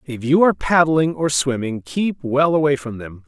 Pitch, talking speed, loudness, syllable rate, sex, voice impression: 140 Hz, 200 wpm, -18 LUFS, 4.8 syllables/s, male, very masculine, adult-like, slightly middle-aged, slightly thick, slightly tensed, powerful, very bright, hard, very clear, very fluent, slightly raspy, cool, intellectual, very refreshing, very sincere, calm, friendly, very reassuring, unique, wild, very lively, slightly kind, intense, light